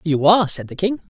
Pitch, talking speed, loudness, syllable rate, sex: 175 Hz, 255 wpm, -18 LUFS, 6.3 syllables/s, male